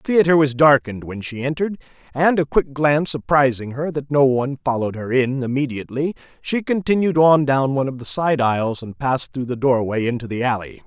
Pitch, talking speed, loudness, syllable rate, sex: 135 Hz, 205 wpm, -19 LUFS, 5.9 syllables/s, male